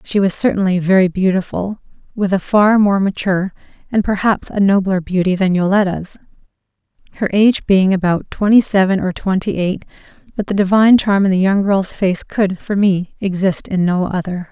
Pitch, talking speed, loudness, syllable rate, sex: 190 Hz, 175 wpm, -15 LUFS, 5.2 syllables/s, female